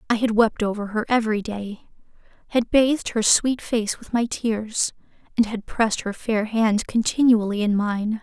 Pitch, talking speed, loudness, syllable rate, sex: 220 Hz, 170 wpm, -22 LUFS, 4.8 syllables/s, female